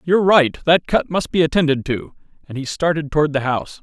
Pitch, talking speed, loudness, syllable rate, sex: 155 Hz, 205 wpm, -18 LUFS, 6.0 syllables/s, male